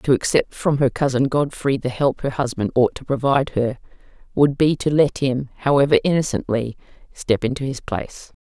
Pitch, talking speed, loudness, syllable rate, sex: 135 Hz, 180 wpm, -20 LUFS, 5.3 syllables/s, female